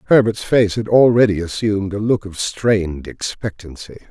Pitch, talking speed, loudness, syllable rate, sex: 105 Hz, 145 wpm, -17 LUFS, 5.0 syllables/s, male